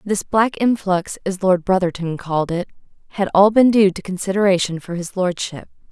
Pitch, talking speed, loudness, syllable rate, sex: 190 Hz, 175 wpm, -18 LUFS, 5.2 syllables/s, female